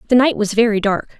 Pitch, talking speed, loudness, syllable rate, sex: 220 Hz, 250 wpm, -16 LUFS, 6.5 syllables/s, female